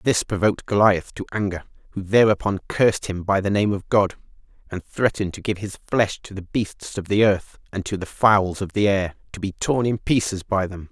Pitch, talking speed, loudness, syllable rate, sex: 100 Hz, 220 wpm, -22 LUFS, 5.3 syllables/s, male